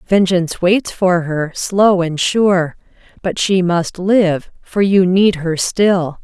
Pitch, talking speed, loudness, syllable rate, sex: 180 Hz, 155 wpm, -15 LUFS, 3.3 syllables/s, female